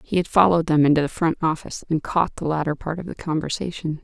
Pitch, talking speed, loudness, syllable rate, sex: 160 Hz, 240 wpm, -22 LUFS, 6.5 syllables/s, female